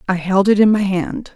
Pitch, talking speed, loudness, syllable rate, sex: 195 Hz, 265 wpm, -15 LUFS, 5.0 syllables/s, female